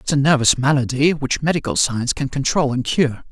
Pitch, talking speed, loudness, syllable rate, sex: 140 Hz, 200 wpm, -18 LUFS, 5.6 syllables/s, male